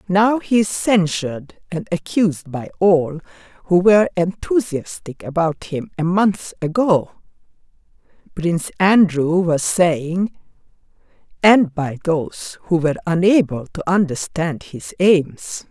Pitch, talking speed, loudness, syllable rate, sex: 175 Hz, 115 wpm, -18 LUFS, 4.0 syllables/s, female